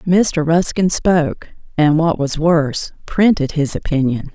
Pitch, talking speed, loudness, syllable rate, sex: 160 Hz, 140 wpm, -16 LUFS, 4.0 syllables/s, female